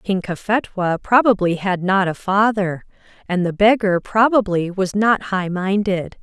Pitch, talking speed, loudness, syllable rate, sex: 195 Hz, 145 wpm, -18 LUFS, 4.2 syllables/s, female